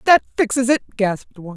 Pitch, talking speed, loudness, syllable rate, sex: 235 Hz, 190 wpm, -18 LUFS, 6.9 syllables/s, female